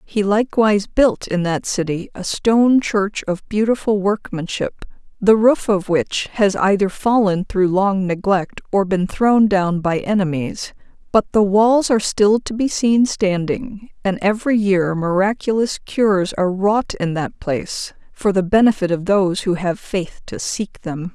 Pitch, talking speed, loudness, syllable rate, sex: 200 Hz, 165 wpm, -18 LUFS, 4.4 syllables/s, female